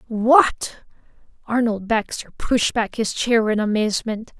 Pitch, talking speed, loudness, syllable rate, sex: 225 Hz, 125 wpm, -20 LUFS, 4.0 syllables/s, female